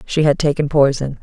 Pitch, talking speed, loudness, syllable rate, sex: 145 Hz, 195 wpm, -16 LUFS, 5.3 syllables/s, female